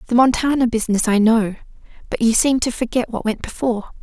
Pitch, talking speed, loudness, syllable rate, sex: 235 Hz, 195 wpm, -18 LUFS, 6.4 syllables/s, female